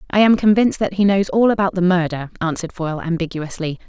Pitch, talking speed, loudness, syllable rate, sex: 180 Hz, 200 wpm, -18 LUFS, 6.5 syllables/s, female